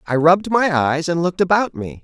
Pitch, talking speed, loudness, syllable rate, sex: 165 Hz, 235 wpm, -17 LUFS, 5.8 syllables/s, male